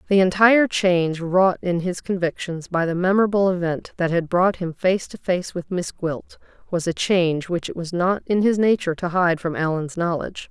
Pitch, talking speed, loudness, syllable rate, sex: 180 Hz, 205 wpm, -21 LUFS, 5.2 syllables/s, female